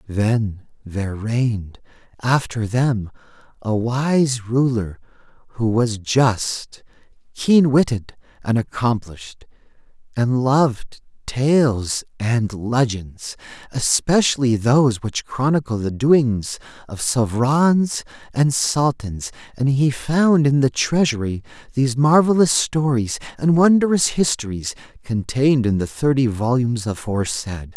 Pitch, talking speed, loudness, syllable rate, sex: 125 Hz, 105 wpm, -19 LUFS, 3.7 syllables/s, male